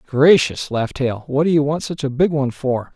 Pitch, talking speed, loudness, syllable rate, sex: 140 Hz, 245 wpm, -18 LUFS, 5.4 syllables/s, male